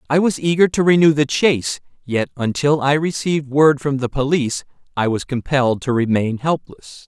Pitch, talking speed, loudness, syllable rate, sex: 140 Hz, 180 wpm, -18 LUFS, 5.3 syllables/s, male